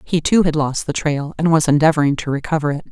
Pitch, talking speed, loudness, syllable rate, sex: 150 Hz, 245 wpm, -17 LUFS, 6.2 syllables/s, female